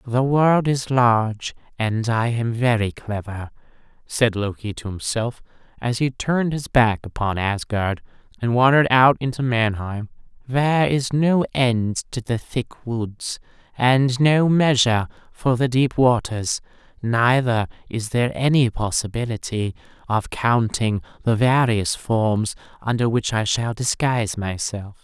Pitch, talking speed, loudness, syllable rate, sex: 120 Hz, 135 wpm, -21 LUFS, 4.1 syllables/s, male